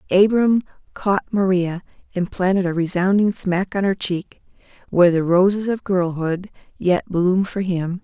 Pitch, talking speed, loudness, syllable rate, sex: 185 Hz, 150 wpm, -19 LUFS, 4.5 syllables/s, female